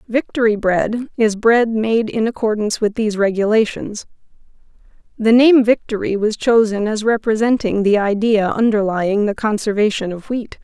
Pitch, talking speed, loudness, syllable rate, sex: 215 Hz, 135 wpm, -16 LUFS, 4.9 syllables/s, female